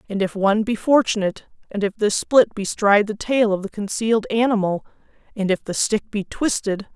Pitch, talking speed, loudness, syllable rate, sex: 210 Hz, 190 wpm, -20 LUFS, 5.5 syllables/s, female